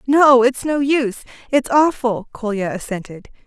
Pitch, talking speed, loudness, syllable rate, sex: 245 Hz, 140 wpm, -17 LUFS, 4.6 syllables/s, female